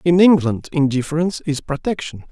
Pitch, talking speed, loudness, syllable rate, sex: 155 Hz, 130 wpm, -18 LUFS, 5.7 syllables/s, male